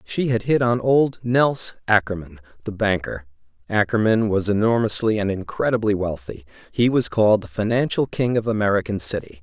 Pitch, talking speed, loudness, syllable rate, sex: 105 Hz, 155 wpm, -21 LUFS, 5.3 syllables/s, male